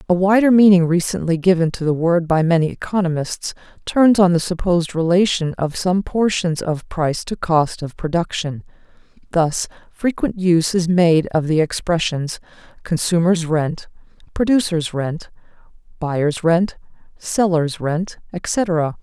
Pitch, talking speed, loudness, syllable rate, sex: 170 Hz, 130 wpm, -18 LUFS, 4.4 syllables/s, female